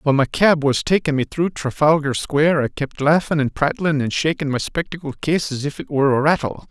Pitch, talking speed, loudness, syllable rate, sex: 150 Hz, 225 wpm, -19 LUFS, 5.7 syllables/s, male